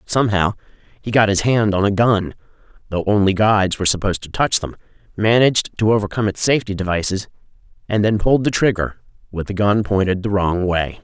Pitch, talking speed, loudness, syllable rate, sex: 100 Hz, 185 wpm, -18 LUFS, 6.2 syllables/s, male